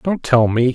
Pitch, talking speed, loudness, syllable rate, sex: 130 Hz, 245 wpm, -16 LUFS, 4.6 syllables/s, male